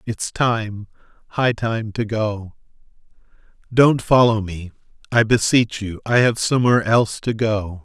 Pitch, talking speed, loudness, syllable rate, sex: 110 Hz, 140 wpm, -19 LUFS, 4.3 syllables/s, male